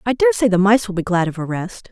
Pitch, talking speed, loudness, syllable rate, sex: 210 Hz, 345 wpm, -17 LUFS, 6.2 syllables/s, female